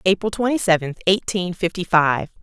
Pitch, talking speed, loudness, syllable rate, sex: 185 Hz, 150 wpm, -20 LUFS, 5.1 syllables/s, female